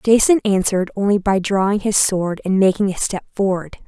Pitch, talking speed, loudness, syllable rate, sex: 195 Hz, 185 wpm, -17 LUFS, 5.3 syllables/s, female